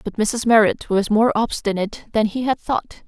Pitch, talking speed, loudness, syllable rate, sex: 220 Hz, 195 wpm, -19 LUFS, 5.1 syllables/s, female